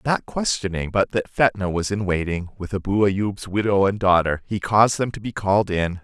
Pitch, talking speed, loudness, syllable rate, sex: 100 Hz, 210 wpm, -21 LUFS, 5.2 syllables/s, male